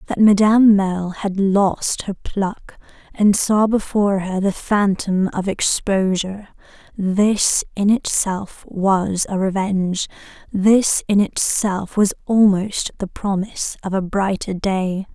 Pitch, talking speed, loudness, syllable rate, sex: 195 Hz, 125 wpm, -18 LUFS, 3.7 syllables/s, female